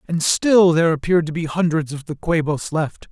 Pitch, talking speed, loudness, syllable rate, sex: 160 Hz, 210 wpm, -19 LUFS, 5.4 syllables/s, male